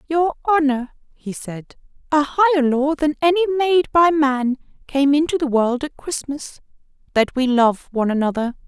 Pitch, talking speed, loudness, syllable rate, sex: 285 Hz, 150 wpm, -19 LUFS, 4.6 syllables/s, female